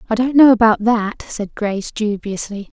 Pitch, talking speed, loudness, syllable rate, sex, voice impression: 220 Hz, 170 wpm, -16 LUFS, 4.8 syllables/s, female, feminine, adult-like, tensed, powerful, fluent, raspy, intellectual, slightly friendly, lively, slightly sharp